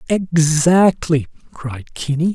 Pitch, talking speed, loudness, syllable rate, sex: 155 Hz, 75 wpm, -16 LUFS, 3.1 syllables/s, male